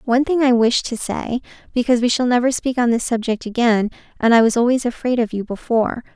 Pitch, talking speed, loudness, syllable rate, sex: 240 Hz, 225 wpm, -18 LUFS, 6.2 syllables/s, female